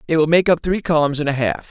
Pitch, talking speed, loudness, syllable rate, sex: 155 Hz, 315 wpm, -17 LUFS, 6.3 syllables/s, male